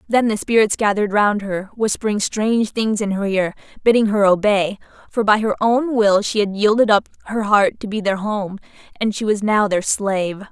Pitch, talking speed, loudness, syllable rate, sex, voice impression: 210 Hz, 205 wpm, -18 LUFS, 5.1 syllables/s, female, very feminine, very young, slightly adult-like, very thin, tensed, slightly powerful, very bright, hard, very clear, very fluent, slightly raspy, very cute, slightly intellectual, very refreshing, sincere, slightly calm, very friendly, very reassuring, very unique, slightly elegant, wild, slightly sweet, very lively, strict, slightly intense, sharp, very light